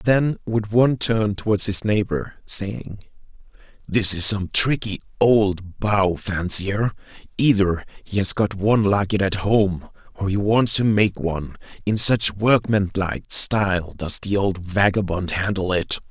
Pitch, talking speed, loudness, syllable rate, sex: 100 Hz, 150 wpm, -20 LUFS, 4.0 syllables/s, male